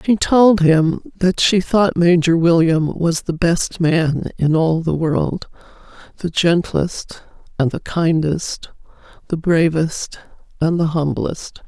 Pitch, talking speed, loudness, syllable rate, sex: 170 Hz, 130 wpm, -17 LUFS, 3.4 syllables/s, female